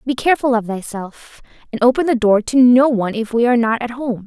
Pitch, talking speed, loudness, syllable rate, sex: 240 Hz, 240 wpm, -16 LUFS, 6.0 syllables/s, female